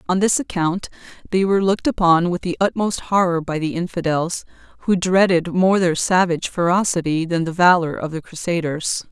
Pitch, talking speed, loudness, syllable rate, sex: 175 Hz, 170 wpm, -19 LUFS, 5.3 syllables/s, female